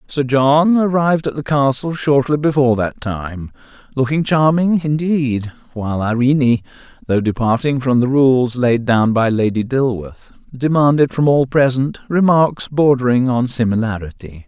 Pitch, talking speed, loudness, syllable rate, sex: 130 Hz, 135 wpm, -16 LUFS, 4.5 syllables/s, male